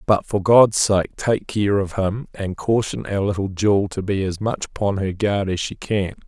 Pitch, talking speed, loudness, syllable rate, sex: 100 Hz, 220 wpm, -20 LUFS, 4.5 syllables/s, male